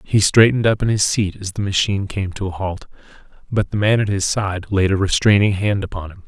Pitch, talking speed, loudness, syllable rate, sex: 100 Hz, 230 wpm, -18 LUFS, 5.9 syllables/s, male